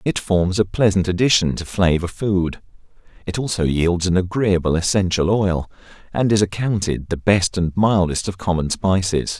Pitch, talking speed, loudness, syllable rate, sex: 95 Hz, 160 wpm, -19 LUFS, 4.7 syllables/s, male